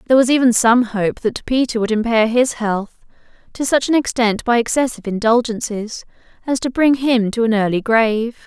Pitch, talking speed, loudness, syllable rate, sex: 235 Hz, 185 wpm, -17 LUFS, 5.3 syllables/s, female